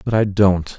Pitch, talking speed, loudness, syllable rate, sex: 100 Hz, 230 wpm, -16 LUFS, 4.4 syllables/s, male